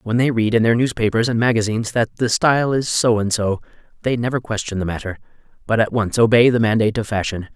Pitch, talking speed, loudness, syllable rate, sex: 115 Hz, 220 wpm, -18 LUFS, 6.4 syllables/s, male